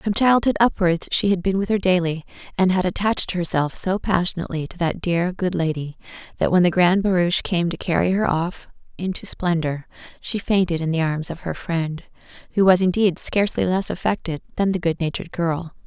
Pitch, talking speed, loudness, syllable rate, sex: 180 Hz, 190 wpm, -21 LUFS, 5.5 syllables/s, female